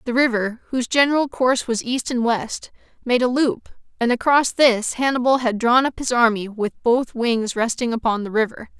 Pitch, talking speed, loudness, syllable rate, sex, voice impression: 240 Hz, 190 wpm, -20 LUFS, 5.0 syllables/s, female, feminine, very adult-like, clear, intellectual, slightly sharp